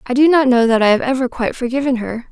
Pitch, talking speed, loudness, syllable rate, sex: 250 Hz, 285 wpm, -15 LUFS, 6.9 syllables/s, female